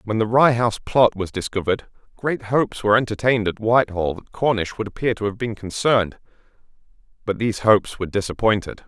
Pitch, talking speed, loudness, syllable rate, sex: 110 Hz, 175 wpm, -21 LUFS, 6.3 syllables/s, male